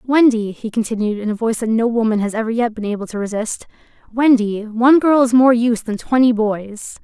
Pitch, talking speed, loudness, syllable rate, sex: 230 Hz, 215 wpm, -17 LUFS, 5.7 syllables/s, female